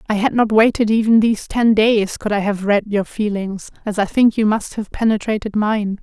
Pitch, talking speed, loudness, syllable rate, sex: 210 Hz, 220 wpm, -17 LUFS, 5.1 syllables/s, female